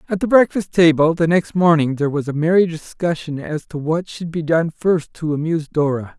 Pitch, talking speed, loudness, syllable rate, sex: 160 Hz, 215 wpm, -18 LUFS, 5.3 syllables/s, male